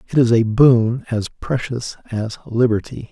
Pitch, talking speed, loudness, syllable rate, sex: 115 Hz, 155 wpm, -18 LUFS, 4.4 syllables/s, male